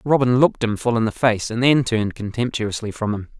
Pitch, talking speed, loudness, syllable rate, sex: 115 Hz, 230 wpm, -20 LUFS, 5.8 syllables/s, male